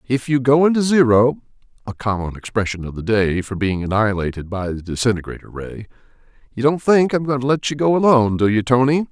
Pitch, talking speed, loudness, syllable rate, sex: 120 Hz, 205 wpm, -18 LUFS, 3.4 syllables/s, male